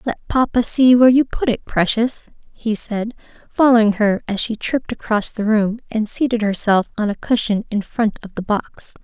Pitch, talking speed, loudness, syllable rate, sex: 225 Hz, 195 wpm, -18 LUFS, 4.9 syllables/s, female